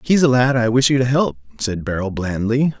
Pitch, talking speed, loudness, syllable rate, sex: 120 Hz, 255 wpm, -18 LUFS, 5.7 syllables/s, male